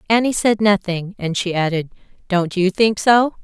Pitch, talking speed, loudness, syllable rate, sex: 200 Hz, 175 wpm, -18 LUFS, 4.6 syllables/s, female